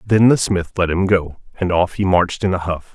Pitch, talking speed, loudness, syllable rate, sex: 95 Hz, 265 wpm, -17 LUFS, 5.2 syllables/s, male